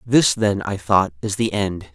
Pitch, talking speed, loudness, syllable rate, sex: 100 Hz, 215 wpm, -20 LUFS, 4.2 syllables/s, male